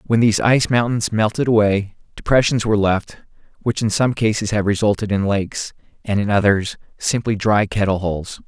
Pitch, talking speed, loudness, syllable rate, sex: 105 Hz, 170 wpm, -18 LUFS, 5.5 syllables/s, male